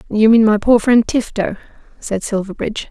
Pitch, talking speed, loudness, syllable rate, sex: 220 Hz, 165 wpm, -15 LUFS, 5.3 syllables/s, female